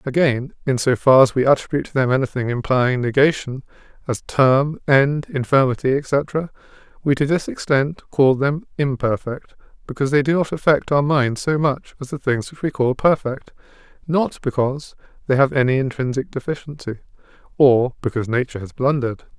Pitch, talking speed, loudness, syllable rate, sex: 135 Hz, 160 wpm, -19 LUFS, 5.4 syllables/s, male